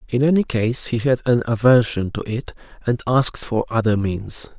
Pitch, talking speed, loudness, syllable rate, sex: 120 Hz, 185 wpm, -19 LUFS, 4.9 syllables/s, male